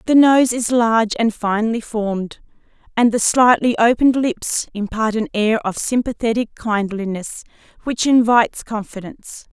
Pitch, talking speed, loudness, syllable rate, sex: 225 Hz, 130 wpm, -17 LUFS, 4.8 syllables/s, female